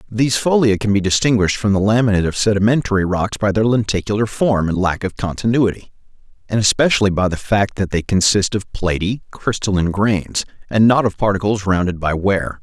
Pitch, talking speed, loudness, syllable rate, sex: 105 Hz, 180 wpm, -17 LUFS, 5.8 syllables/s, male